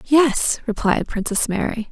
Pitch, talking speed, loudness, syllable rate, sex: 235 Hz, 125 wpm, -20 LUFS, 4.0 syllables/s, female